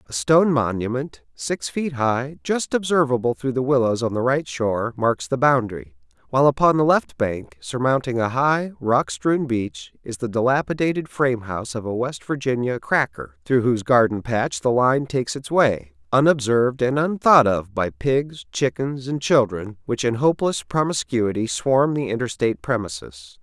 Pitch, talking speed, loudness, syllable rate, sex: 125 Hz, 165 wpm, -21 LUFS, 4.9 syllables/s, male